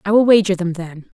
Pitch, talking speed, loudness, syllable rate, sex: 190 Hz, 250 wpm, -15 LUFS, 6.1 syllables/s, female